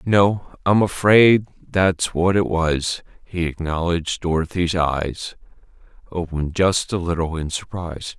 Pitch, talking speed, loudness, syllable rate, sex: 85 Hz, 125 wpm, -20 LUFS, 4.1 syllables/s, male